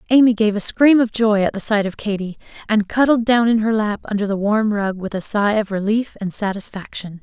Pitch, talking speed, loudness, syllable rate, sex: 210 Hz, 235 wpm, -18 LUFS, 5.4 syllables/s, female